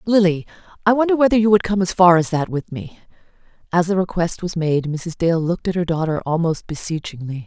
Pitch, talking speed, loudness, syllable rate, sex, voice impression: 175 Hz, 210 wpm, -19 LUFS, 5.7 syllables/s, female, feminine, middle-aged, tensed, powerful, hard, clear, fluent, intellectual, elegant, lively, slightly strict, sharp